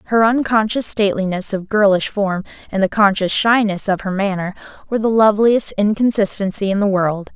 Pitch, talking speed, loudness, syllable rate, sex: 205 Hz, 165 wpm, -17 LUFS, 5.6 syllables/s, female